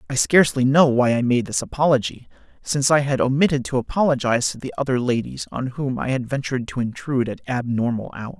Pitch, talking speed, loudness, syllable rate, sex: 130 Hz, 200 wpm, -21 LUFS, 6.2 syllables/s, male